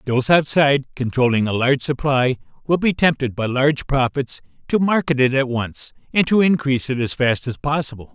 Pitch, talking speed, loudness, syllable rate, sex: 135 Hz, 185 wpm, -19 LUFS, 5.5 syllables/s, male